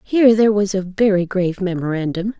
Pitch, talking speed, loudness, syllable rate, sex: 195 Hz, 175 wpm, -17 LUFS, 6.1 syllables/s, female